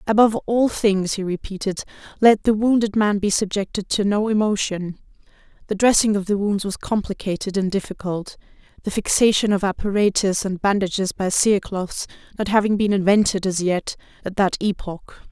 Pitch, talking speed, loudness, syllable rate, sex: 200 Hz, 155 wpm, -20 LUFS, 5.3 syllables/s, female